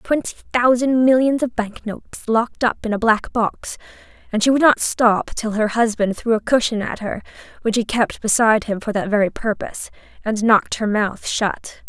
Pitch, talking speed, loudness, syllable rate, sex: 225 Hz, 195 wpm, -19 LUFS, 4.0 syllables/s, female